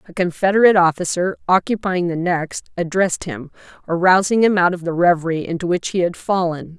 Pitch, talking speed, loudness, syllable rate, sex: 180 Hz, 170 wpm, -18 LUFS, 5.6 syllables/s, female